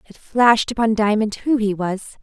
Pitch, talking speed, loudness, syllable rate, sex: 215 Hz, 190 wpm, -18 LUFS, 5.1 syllables/s, female